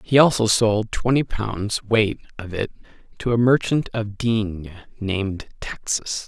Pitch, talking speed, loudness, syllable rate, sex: 110 Hz, 145 wpm, -22 LUFS, 4.1 syllables/s, male